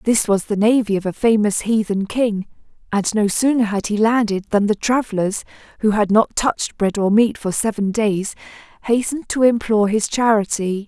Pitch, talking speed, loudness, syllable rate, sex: 215 Hz, 180 wpm, -18 LUFS, 5.1 syllables/s, female